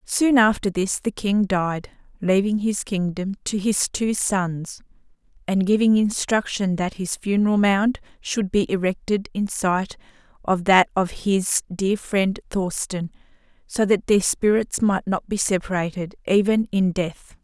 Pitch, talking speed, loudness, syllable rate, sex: 195 Hz, 150 wpm, -22 LUFS, 4.0 syllables/s, female